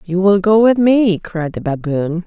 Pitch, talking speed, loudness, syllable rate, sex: 190 Hz, 210 wpm, -14 LUFS, 4.2 syllables/s, female